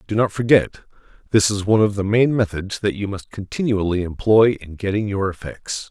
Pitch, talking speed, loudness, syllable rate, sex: 100 Hz, 195 wpm, -19 LUFS, 5.4 syllables/s, male